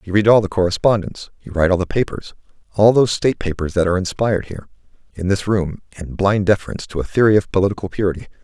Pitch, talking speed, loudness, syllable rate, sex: 95 Hz, 205 wpm, -18 LUFS, 7.4 syllables/s, male